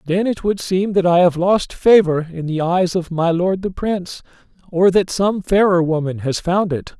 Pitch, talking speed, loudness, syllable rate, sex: 180 Hz, 215 wpm, -17 LUFS, 4.7 syllables/s, male